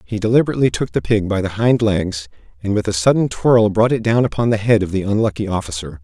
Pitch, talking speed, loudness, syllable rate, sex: 105 Hz, 240 wpm, -17 LUFS, 6.4 syllables/s, male